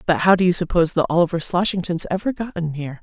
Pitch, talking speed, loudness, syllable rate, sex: 175 Hz, 240 wpm, -20 LUFS, 7.1 syllables/s, female